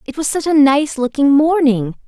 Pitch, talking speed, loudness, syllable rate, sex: 285 Hz, 200 wpm, -14 LUFS, 4.8 syllables/s, female